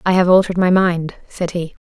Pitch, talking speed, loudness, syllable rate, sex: 180 Hz, 230 wpm, -16 LUFS, 5.6 syllables/s, female